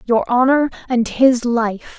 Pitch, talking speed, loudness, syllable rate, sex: 240 Hz, 150 wpm, -16 LUFS, 3.7 syllables/s, female